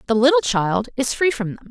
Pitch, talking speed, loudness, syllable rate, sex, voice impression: 250 Hz, 245 wpm, -19 LUFS, 5.6 syllables/s, female, very feminine, slightly adult-like, slightly bright, slightly fluent, slightly cute, slightly unique